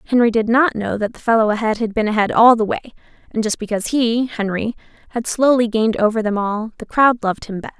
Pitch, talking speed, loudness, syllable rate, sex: 225 Hz, 215 wpm, -17 LUFS, 6.1 syllables/s, female